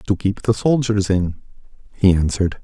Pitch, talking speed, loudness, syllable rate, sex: 100 Hz, 160 wpm, -19 LUFS, 5.4 syllables/s, male